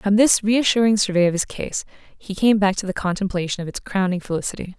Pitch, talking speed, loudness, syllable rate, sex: 200 Hz, 215 wpm, -20 LUFS, 6.0 syllables/s, female